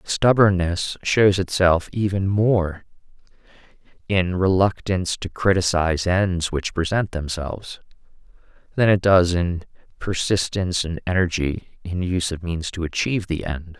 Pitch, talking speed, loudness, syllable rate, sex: 90 Hz, 120 wpm, -21 LUFS, 4.5 syllables/s, male